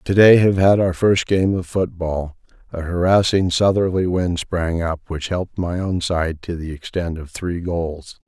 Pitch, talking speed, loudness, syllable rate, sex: 90 Hz, 190 wpm, -19 LUFS, 4.3 syllables/s, male